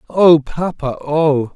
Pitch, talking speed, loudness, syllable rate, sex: 150 Hz, 115 wpm, -15 LUFS, 3.0 syllables/s, male